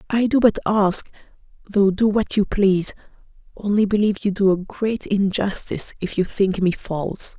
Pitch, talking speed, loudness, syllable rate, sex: 200 Hz, 170 wpm, -20 LUFS, 5.0 syllables/s, female